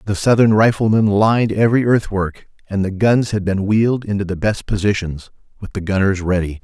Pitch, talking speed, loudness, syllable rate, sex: 100 Hz, 180 wpm, -17 LUFS, 5.5 syllables/s, male